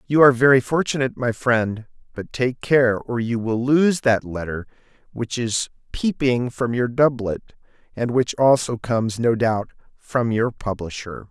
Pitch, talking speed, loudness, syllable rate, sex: 120 Hz, 160 wpm, -21 LUFS, 4.4 syllables/s, male